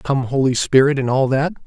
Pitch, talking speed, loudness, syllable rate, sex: 135 Hz, 215 wpm, -17 LUFS, 5.3 syllables/s, male